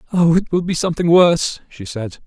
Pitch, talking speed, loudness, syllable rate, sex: 160 Hz, 210 wpm, -16 LUFS, 6.2 syllables/s, male